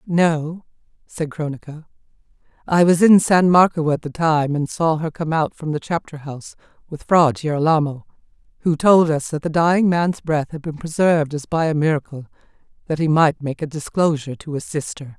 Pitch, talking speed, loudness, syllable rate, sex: 155 Hz, 185 wpm, -19 LUFS, 5.2 syllables/s, female